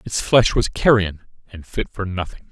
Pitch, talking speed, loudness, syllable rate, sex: 100 Hz, 190 wpm, -19 LUFS, 4.7 syllables/s, male